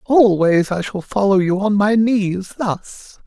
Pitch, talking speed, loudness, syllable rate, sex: 200 Hz, 165 wpm, -17 LUFS, 3.6 syllables/s, male